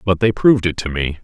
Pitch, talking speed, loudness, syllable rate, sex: 95 Hz, 290 wpm, -16 LUFS, 6.4 syllables/s, male